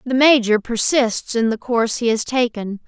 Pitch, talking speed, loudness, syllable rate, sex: 235 Hz, 190 wpm, -18 LUFS, 4.7 syllables/s, female